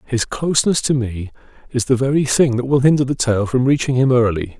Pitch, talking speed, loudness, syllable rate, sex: 125 Hz, 220 wpm, -17 LUFS, 5.6 syllables/s, male